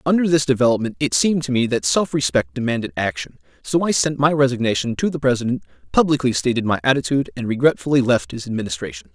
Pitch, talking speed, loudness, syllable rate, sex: 140 Hz, 190 wpm, -19 LUFS, 6.7 syllables/s, male